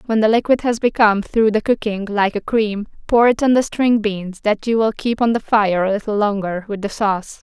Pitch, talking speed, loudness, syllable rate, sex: 215 Hz, 240 wpm, -17 LUFS, 5.3 syllables/s, female